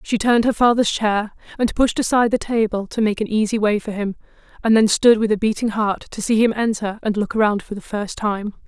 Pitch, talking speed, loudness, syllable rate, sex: 215 Hz, 240 wpm, -19 LUFS, 5.6 syllables/s, female